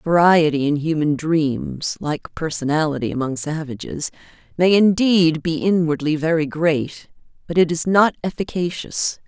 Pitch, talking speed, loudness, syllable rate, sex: 160 Hz, 125 wpm, -19 LUFS, 4.4 syllables/s, female